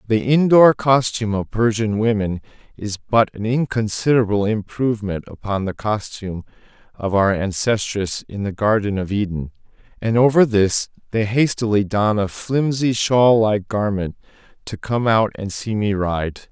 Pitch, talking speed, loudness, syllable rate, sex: 110 Hz, 145 wpm, -19 LUFS, 4.6 syllables/s, male